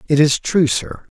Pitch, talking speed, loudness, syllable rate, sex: 155 Hz, 200 wpm, -16 LUFS, 4.3 syllables/s, male